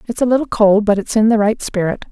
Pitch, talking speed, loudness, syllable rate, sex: 215 Hz, 285 wpm, -15 LUFS, 6.2 syllables/s, female